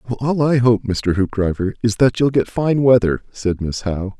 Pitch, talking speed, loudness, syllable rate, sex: 115 Hz, 215 wpm, -18 LUFS, 5.3 syllables/s, male